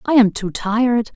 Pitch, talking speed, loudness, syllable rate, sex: 225 Hz, 205 wpm, -17 LUFS, 4.9 syllables/s, female